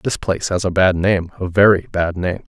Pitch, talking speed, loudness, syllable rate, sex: 95 Hz, 210 wpm, -17 LUFS, 5.3 syllables/s, male